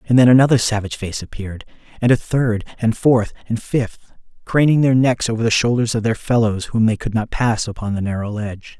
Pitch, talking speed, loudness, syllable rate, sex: 115 Hz, 210 wpm, -18 LUFS, 5.9 syllables/s, male